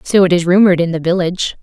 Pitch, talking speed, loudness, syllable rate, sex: 180 Hz, 260 wpm, -13 LUFS, 7.3 syllables/s, female